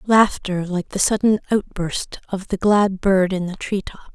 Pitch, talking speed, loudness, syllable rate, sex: 195 Hz, 190 wpm, -20 LUFS, 4.4 syllables/s, female